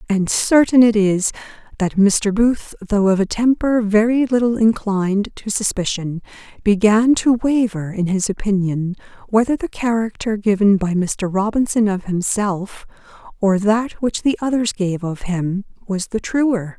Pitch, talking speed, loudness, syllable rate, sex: 210 Hz, 150 wpm, -18 LUFS, 4.3 syllables/s, female